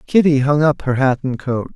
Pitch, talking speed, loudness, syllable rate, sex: 140 Hz, 240 wpm, -16 LUFS, 5.1 syllables/s, male